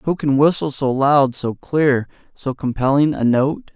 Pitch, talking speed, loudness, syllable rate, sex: 140 Hz, 175 wpm, -18 LUFS, 4.1 syllables/s, male